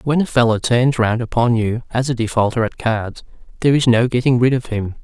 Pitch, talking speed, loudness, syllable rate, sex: 120 Hz, 240 wpm, -17 LUFS, 5.9 syllables/s, male